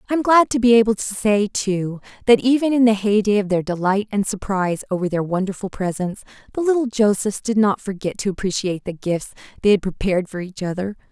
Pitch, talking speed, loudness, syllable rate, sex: 205 Hz, 205 wpm, -20 LUFS, 5.9 syllables/s, female